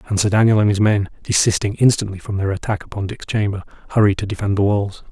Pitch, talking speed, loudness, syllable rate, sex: 100 Hz, 225 wpm, -18 LUFS, 6.6 syllables/s, male